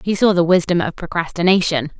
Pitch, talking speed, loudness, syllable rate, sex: 175 Hz, 180 wpm, -17 LUFS, 6.0 syllables/s, female